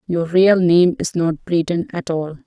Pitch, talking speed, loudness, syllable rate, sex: 170 Hz, 195 wpm, -17 LUFS, 4.1 syllables/s, female